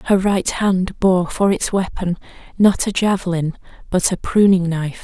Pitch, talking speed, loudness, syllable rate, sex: 185 Hz, 165 wpm, -18 LUFS, 4.6 syllables/s, female